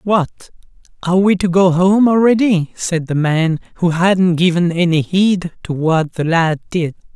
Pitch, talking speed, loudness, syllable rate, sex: 175 Hz, 170 wpm, -15 LUFS, 4.4 syllables/s, male